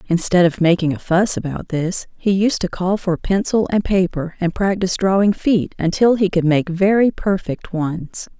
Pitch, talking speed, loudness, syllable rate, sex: 185 Hz, 185 wpm, -18 LUFS, 4.6 syllables/s, female